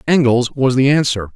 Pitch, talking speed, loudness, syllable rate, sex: 130 Hz, 175 wpm, -15 LUFS, 5.1 syllables/s, male